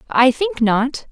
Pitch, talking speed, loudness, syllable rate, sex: 265 Hz, 160 wpm, -17 LUFS, 3.2 syllables/s, female